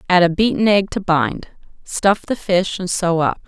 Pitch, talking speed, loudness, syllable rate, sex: 185 Hz, 205 wpm, -17 LUFS, 4.3 syllables/s, female